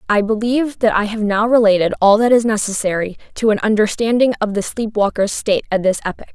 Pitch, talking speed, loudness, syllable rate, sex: 215 Hz, 210 wpm, -16 LUFS, 6.1 syllables/s, female